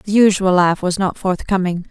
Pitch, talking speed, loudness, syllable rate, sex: 185 Hz, 190 wpm, -16 LUFS, 4.8 syllables/s, female